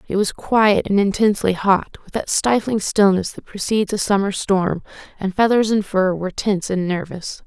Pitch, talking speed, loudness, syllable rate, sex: 200 Hz, 185 wpm, -19 LUFS, 5.0 syllables/s, female